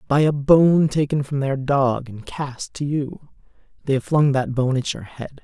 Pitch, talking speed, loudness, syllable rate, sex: 140 Hz, 210 wpm, -20 LUFS, 4.3 syllables/s, male